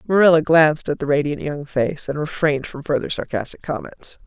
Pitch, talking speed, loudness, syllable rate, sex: 155 Hz, 185 wpm, -20 LUFS, 5.7 syllables/s, female